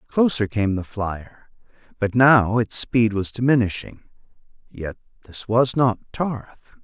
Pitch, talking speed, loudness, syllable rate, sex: 110 Hz, 125 wpm, -21 LUFS, 3.7 syllables/s, male